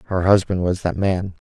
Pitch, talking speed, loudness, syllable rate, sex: 90 Hz, 205 wpm, -20 LUFS, 5.2 syllables/s, male